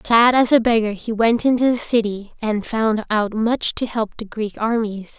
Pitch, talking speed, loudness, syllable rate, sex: 225 Hz, 210 wpm, -19 LUFS, 4.4 syllables/s, female